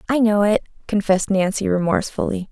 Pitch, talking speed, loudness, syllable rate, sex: 200 Hz, 145 wpm, -19 LUFS, 6.3 syllables/s, female